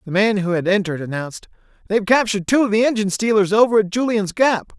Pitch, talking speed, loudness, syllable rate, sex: 205 Hz, 215 wpm, -18 LUFS, 6.8 syllables/s, male